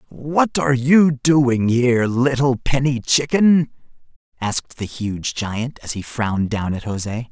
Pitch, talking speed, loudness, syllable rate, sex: 125 Hz, 150 wpm, -19 LUFS, 3.9 syllables/s, male